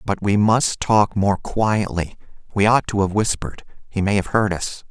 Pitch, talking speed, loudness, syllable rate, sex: 105 Hz, 170 wpm, -20 LUFS, 4.6 syllables/s, male